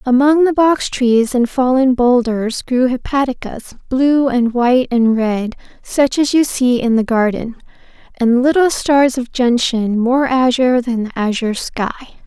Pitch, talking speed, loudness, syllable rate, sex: 250 Hz, 155 wpm, -15 LUFS, 4.2 syllables/s, female